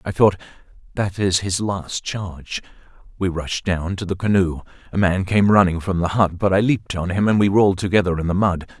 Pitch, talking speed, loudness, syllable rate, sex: 95 Hz, 220 wpm, -20 LUFS, 5.4 syllables/s, male